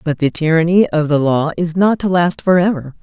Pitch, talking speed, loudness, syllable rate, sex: 165 Hz, 220 wpm, -15 LUFS, 5.3 syllables/s, female